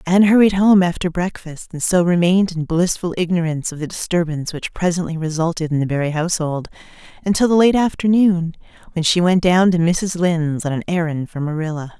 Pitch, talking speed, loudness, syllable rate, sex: 170 Hz, 185 wpm, -18 LUFS, 6.0 syllables/s, female